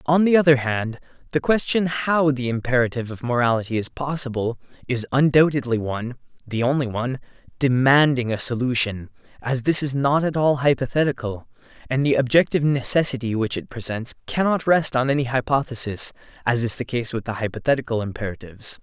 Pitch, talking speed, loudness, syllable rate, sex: 130 Hz, 155 wpm, -21 LUFS, 5.8 syllables/s, male